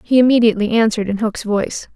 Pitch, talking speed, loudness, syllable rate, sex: 220 Hz, 185 wpm, -16 LUFS, 7.1 syllables/s, female